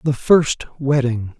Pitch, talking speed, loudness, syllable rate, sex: 135 Hz, 130 wpm, -18 LUFS, 3.5 syllables/s, male